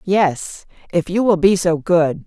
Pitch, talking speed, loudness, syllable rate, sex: 175 Hz, 185 wpm, -17 LUFS, 3.7 syllables/s, female